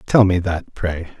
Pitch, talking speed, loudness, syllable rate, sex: 90 Hz, 200 wpm, -19 LUFS, 4.0 syllables/s, male